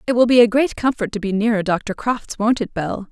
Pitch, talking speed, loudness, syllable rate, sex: 220 Hz, 270 wpm, -18 LUFS, 5.4 syllables/s, female